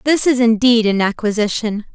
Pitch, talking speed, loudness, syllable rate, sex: 230 Hz, 155 wpm, -15 LUFS, 5.1 syllables/s, female